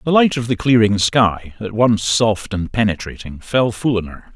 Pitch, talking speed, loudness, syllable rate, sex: 110 Hz, 205 wpm, -17 LUFS, 4.5 syllables/s, male